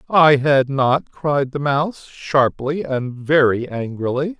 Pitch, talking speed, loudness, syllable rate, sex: 140 Hz, 135 wpm, -18 LUFS, 3.6 syllables/s, male